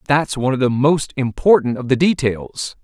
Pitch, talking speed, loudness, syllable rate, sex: 135 Hz, 190 wpm, -17 LUFS, 5.0 syllables/s, male